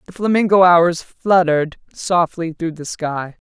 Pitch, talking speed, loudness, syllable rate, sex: 170 Hz, 140 wpm, -17 LUFS, 4.3 syllables/s, female